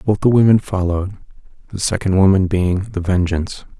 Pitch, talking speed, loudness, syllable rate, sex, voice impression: 95 Hz, 160 wpm, -16 LUFS, 5.6 syllables/s, male, masculine, adult-like, slightly weak, slightly soft, slightly raspy, very calm, reassuring, kind